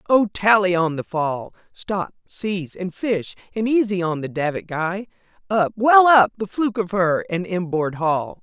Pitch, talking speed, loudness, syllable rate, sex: 190 Hz, 180 wpm, -20 LUFS, 4.4 syllables/s, female